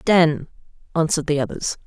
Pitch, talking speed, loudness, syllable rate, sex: 155 Hz, 130 wpm, -21 LUFS, 5.7 syllables/s, female